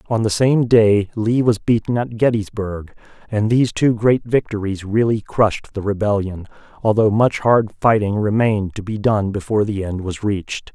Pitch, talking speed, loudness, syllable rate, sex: 110 Hz, 175 wpm, -18 LUFS, 4.9 syllables/s, male